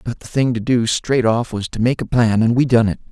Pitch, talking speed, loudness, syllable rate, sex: 115 Hz, 310 wpm, -17 LUFS, 5.5 syllables/s, male